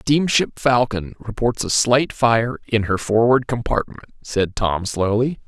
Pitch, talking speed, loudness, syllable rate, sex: 115 Hz, 140 wpm, -19 LUFS, 4.1 syllables/s, male